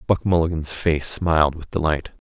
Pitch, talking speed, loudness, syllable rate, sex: 80 Hz, 160 wpm, -21 LUFS, 5.0 syllables/s, male